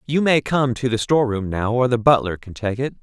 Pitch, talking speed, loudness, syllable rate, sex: 120 Hz, 275 wpm, -19 LUFS, 5.7 syllables/s, male